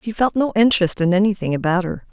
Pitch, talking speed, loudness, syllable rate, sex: 195 Hz, 225 wpm, -18 LUFS, 6.6 syllables/s, female